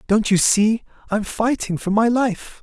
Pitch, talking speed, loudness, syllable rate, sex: 215 Hz, 185 wpm, -19 LUFS, 4.1 syllables/s, male